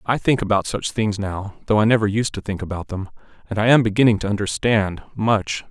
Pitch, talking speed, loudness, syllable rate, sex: 105 Hz, 210 wpm, -20 LUFS, 5.6 syllables/s, male